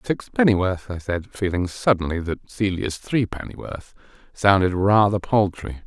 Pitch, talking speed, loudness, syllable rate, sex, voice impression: 95 Hz, 115 wpm, -22 LUFS, 4.6 syllables/s, male, very masculine, very adult-like, slightly old, very thick, relaxed, weak, slightly dark, slightly soft, very muffled, slightly halting, slightly raspy, cool, intellectual, very sincere, very calm, very mature, slightly friendly, slightly reassuring, unique, very elegant, sweet, slightly lively, kind